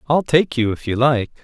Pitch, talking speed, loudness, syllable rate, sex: 130 Hz, 250 wpm, -18 LUFS, 4.8 syllables/s, male